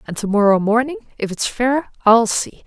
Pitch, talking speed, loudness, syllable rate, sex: 230 Hz, 205 wpm, -17 LUFS, 4.9 syllables/s, female